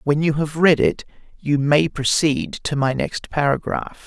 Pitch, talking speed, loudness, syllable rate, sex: 150 Hz, 175 wpm, -19 LUFS, 4.1 syllables/s, male